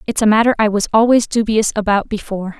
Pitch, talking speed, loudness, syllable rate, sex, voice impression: 215 Hz, 210 wpm, -15 LUFS, 6.4 syllables/s, female, feminine, slightly young, slightly fluent, cute, slightly calm, friendly